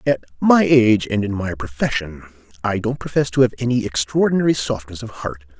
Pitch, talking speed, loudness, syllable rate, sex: 115 Hz, 180 wpm, -19 LUFS, 5.7 syllables/s, male